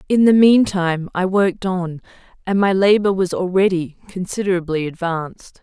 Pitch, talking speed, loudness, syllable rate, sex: 185 Hz, 150 wpm, -17 LUFS, 4.9 syllables/s, female